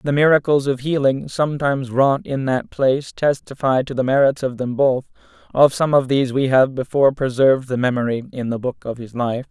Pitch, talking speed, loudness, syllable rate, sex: 135 Hz, 200 wpm, -19 LUFS, 5.6 syllables/s, male